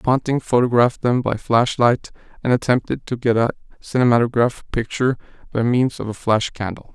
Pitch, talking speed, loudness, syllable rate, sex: 120 Hz, 155 wpm, -19 LUFS, 5.5 syllables/s, male